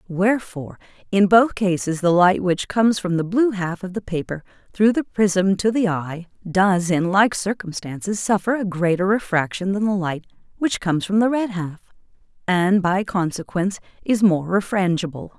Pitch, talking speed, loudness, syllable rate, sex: 190 Hz, 170 wpm, -20 LUFS, 4.8 syllables/s, female